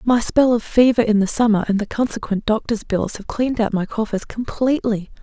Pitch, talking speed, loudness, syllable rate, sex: 225 Hz, 205 wpm, -19 LUFS, 5.6 syllables/s, female